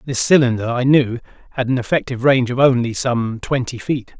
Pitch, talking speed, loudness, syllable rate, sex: 125 Hz, 185 wpm, -17 LUFS, 5.8 syllables/s, male